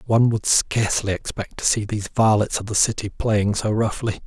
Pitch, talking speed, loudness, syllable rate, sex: 105 Hz, 195 wpm, -21 LUFS, 5.4 syllables/s, male